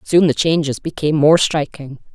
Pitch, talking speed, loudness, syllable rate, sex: 155 Hz, 170 wpm, -16 LUFS, 5.2 syllables/s, female